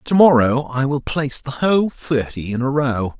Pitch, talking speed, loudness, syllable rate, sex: 135 Hz, 205 wpm, -18 LUFS, 4.9 syllables/s, male